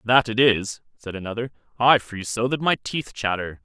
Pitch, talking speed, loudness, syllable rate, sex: 115 Hz, 200 wpm, -22 LUFS, 5.1 syllables/s, male